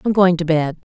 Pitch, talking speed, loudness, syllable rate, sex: 175 Hz, 260 wpm, -17 LUFS, 5.7 syllables/s, female